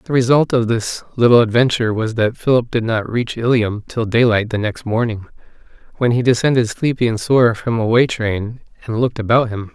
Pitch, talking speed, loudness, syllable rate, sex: 115 Hz, 195 wpm, -17 LUFS, 5.3 syllables/s, male